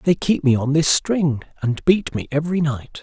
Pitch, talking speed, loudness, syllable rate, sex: 150 Hz, 220 wpm, -19 LUFS, 4.8 syllables/s, male